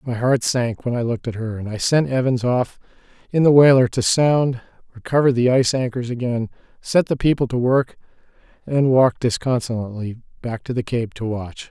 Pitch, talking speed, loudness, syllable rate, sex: 125 Hz, 190 wpm, -19 LUFS, 5.6 syllables/s, male